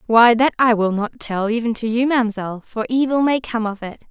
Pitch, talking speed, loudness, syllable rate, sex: 230 Hz, 235 wpm, -18 LUFS, 5.5 syllables/s, female